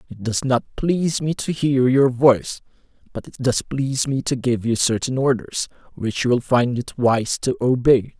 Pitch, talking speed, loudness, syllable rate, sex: 130 Hz, 200 wpm, -20 LUFS, 4.7 syllables/s, male